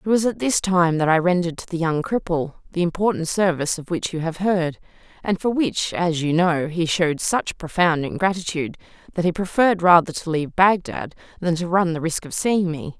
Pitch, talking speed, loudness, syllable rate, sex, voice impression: 175 Hz, 210 wpm, -21 LUFS, 5.5 syllables/s, female, feminine, adult-like, slightly middle-aged, thin, slightly tensed, slightly powerful, bright, hard, clear, fluent, slightly cute, cool, intellectual, refreshing, very sincere, slightly calm, friendly, reassuring, slightly unique, elegant, slightly wild, slightly sweet, lively, strict, slightly sharp